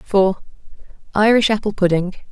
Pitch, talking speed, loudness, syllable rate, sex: 200 Hz, 80 wpm, -17 LUFS, 5.1 syllables/s, female